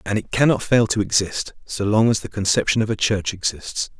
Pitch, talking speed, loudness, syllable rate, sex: 105 Hz, 225 wpm, -20 LUFS, 5.3 syllables/s, male